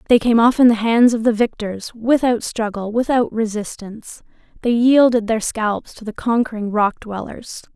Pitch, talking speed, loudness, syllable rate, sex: 225 Hz, 170 wpm, -17 LUFS, 4.7 syllables/s, female